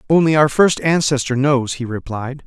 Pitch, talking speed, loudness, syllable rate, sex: 140 Hz, 170 wpm, -17 LUFS, 4.9 syllables/s, male